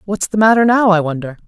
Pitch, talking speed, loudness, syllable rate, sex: 195 Hz, 245 wpm, -13 LUFS, 6.2 syllables/s, female